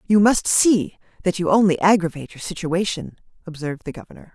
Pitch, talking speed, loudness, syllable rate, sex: 180 Hz, 165 wpm, -19 LUFS, 5.9 syllables/s, female